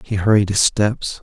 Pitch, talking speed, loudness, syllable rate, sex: 105 Hz, 195 wpm, -17 LUFS, 4.4 syllables/s, male